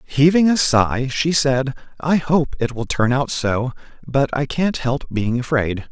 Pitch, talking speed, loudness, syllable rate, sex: 135 Hz, 185 wpm, -19 LUFS, 3.9 syllables/s, male